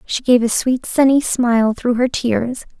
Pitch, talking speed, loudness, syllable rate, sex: 245 Hz, 195 wpm, -16 LUFS, 4.3 syllables/s, female